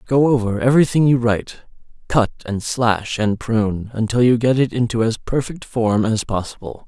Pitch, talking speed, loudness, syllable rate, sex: 115 Hz, 175 wpm, -18 LUFS, 5.2 syllables/s, male